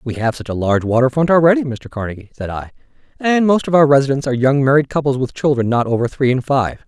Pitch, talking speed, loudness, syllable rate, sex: 135 Hz, 245 wpm, -16 LUFS, 6.5 syllables/s, male